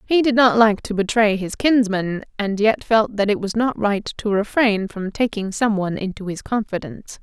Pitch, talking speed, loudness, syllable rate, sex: 210 Hz, 200 wpm, -19 LUFS, 5.0 syllables/s, female